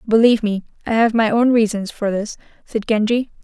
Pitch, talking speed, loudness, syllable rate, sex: 220 Hz, 190 wpm, -18 LUFS, 5.7 syllables/s, female